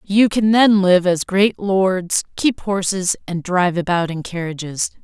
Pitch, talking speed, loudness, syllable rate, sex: 185 Hz, 165 wpm, -17 LUFS, 4.1 syllables/s, female